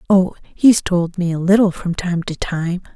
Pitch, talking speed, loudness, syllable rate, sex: 180 Hz, 205 wpm, -17 LUFS, 4.3 syllables/s, female